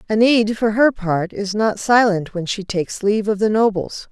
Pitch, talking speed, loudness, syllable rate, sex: 210 Hz, 205 wpm, -18 LUFS, 5.1 syllables/s, female